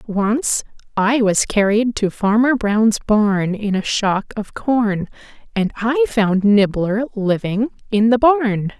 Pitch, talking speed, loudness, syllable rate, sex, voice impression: 220 Hz, 145 wpm, -17 LUFS, 3.4 syllables/s, female, feminine, adult-like, slightly soft, slightly calm, friendly, slightly elegant